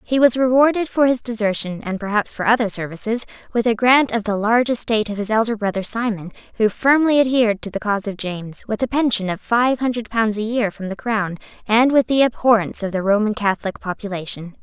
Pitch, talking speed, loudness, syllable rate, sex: 220 Hz, 215 wpm, -19 LUFS, 6.0 syllables/s, female